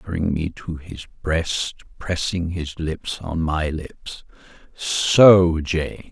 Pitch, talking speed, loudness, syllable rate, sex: 85 Hz, 130 wpm, -20 LUFS, 3.1 syllables/s, male